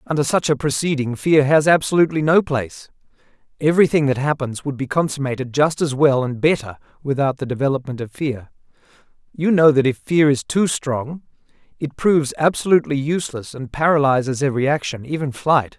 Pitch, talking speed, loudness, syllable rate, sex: 140 Hz, 165 wpm, -18 LUFS, 5.8 syllables/s, male